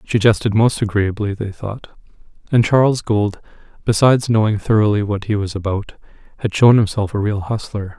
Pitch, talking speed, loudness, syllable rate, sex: 105 Hz, 165 wpm, -17 LUFS, 5.2 syllables/s, male